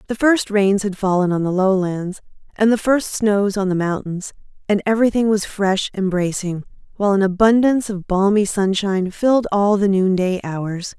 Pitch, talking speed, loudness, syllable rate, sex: 200 Hz, 175 wpm, -18 LUFS, 5.0 syllables/s, female